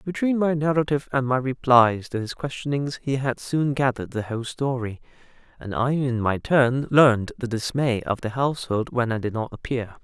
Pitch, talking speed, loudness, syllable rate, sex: 130 Hz, 190 wpm, -23 LUFS, 5.3 syllables/s, male